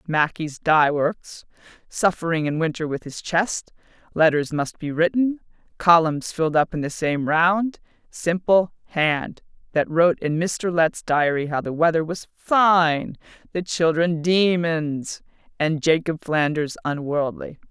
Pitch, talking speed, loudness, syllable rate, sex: 160 Hz, 135 wpm, -21 LUFS, 4.0 syllables/s, female